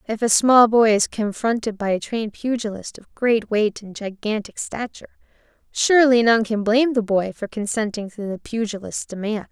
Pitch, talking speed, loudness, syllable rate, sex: 220 Hz, 175 wpm, -20 LUFS, 5.1 syllables/s, female